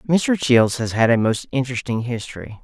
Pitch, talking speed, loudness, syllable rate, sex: 125 Hz, 180 wpm, -19 LUFS, 5.4 syllables/s, male